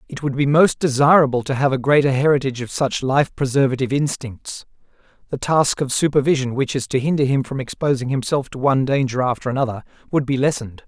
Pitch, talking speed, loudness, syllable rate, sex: 135 Hz, 195 wpm, -19 LUFS, 6.3 syllables/s, male